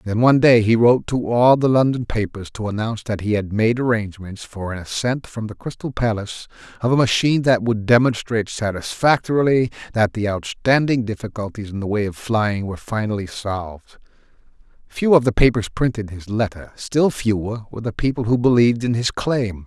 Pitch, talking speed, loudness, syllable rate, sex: 110 Hz, 185 wpm, -19 LUFS, 5.7 syllables/s, male